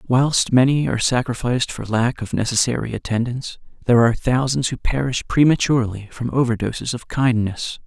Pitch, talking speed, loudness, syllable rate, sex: 125 Hz, 145 wpm, -20 LUFS, 5.7 syllables/s, male